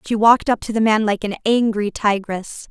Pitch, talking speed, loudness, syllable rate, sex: 215 Hz, 220 wpm, -18 LUFS, 5.2 syllables/s, female